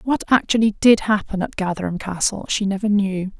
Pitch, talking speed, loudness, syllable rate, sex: 205 Hz, 175 wpm, -19 LUFS, 5.4 syllables/s, female